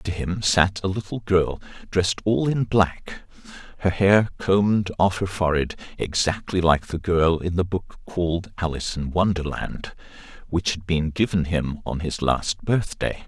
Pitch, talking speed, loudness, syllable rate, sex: 90 Hz, 165 wpm, -23 LUFS, 4.6 syllables/s, male